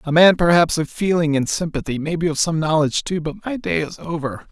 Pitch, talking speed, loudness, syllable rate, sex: 160 Hz, 225 wpm, -19 LUFS, 5.8 syllables/s, male